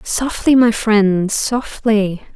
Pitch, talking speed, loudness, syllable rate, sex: 225 Hz, 75 wpm, -15 LUFS, 2.8 syllables/s, female